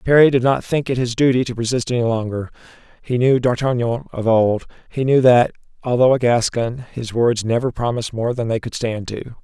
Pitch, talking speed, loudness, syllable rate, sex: 120 Hz, 205 wpm, -18 LUFS, 5.5 syllables/s, male